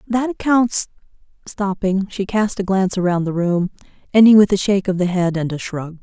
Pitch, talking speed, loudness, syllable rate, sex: 195 Hz, 200 wpm, -18 LUFS, 5.4 syllables/s, female